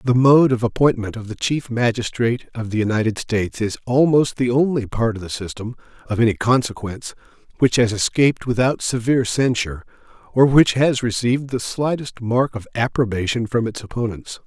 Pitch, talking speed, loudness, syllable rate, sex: 120 Hz, 170 wpm, -19 LUFS, 5.6 syllables/s, male